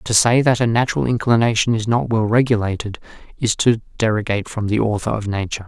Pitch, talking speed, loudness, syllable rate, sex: 110 Hz, 190 wpm, -18 LUFS, 6.3 syllables/s, male